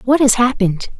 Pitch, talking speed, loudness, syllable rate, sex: 240 Hz, 180 wpm, -15 LUFS, 6.0 syllables/s, female